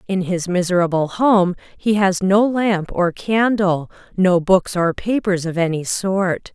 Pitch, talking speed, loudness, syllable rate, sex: 185 Hz, 155 wpm, -18 LUFS, 3.9 syllables/s, female